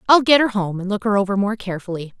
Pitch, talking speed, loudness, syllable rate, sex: 205 Hz, 275 wpm, -19 LUFS, 7.1 syllables/s, female